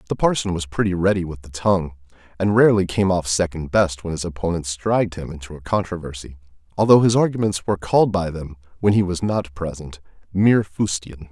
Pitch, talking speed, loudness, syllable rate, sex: 90 Hz, 190 wpm, -20 LUFS, 6.0 syllables/s, male